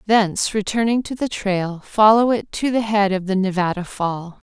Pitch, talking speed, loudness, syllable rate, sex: 205 Hz, 185 wpm, -19 LUFS, 4.8 syllables/s, female